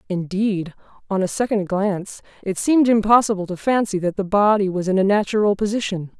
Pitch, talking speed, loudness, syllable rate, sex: 200 Hz, 175 wpm, -20 LUFS, 5.7 syllables/s, female